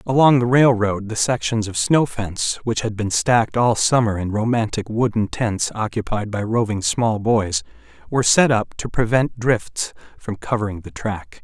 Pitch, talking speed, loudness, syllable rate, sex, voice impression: 110 Hz, 175 wpm, -19 LUFS, 4.7 syllables/s, male, masculine, adult-like, cool, refreshing, sincere